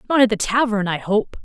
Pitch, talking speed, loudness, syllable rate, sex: 215 Hz, 250 wpm, -19 LUFS, 5.8 syllables/s, female